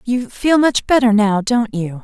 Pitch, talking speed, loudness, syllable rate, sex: 230 Hz, 205 wpm, -15 LUFS, 4.2 syllables/s, female